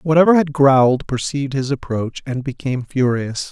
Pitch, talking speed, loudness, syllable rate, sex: 135 Hz, 155 wpm, -18 LUFS, 5.2 syllables/s, male